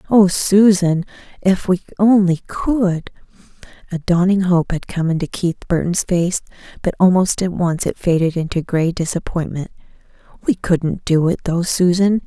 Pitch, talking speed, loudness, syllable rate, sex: 180 Hz, 145 wpm, -17 LUFS, 4.6 syllables/s, female